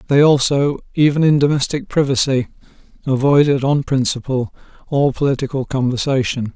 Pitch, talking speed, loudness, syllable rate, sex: 135 Hz, 110 wpm, -17 LUFS, 5.3 syllables/s, male